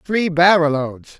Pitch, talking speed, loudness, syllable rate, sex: 165 Hz, 150 wpm, -16 LUFS, 3.7 syllables/s, male